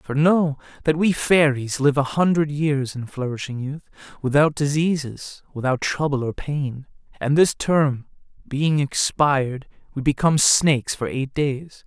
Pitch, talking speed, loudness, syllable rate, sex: 145 Hz, 145 wpm, -21 LUFS, 4.2 syllables/s, male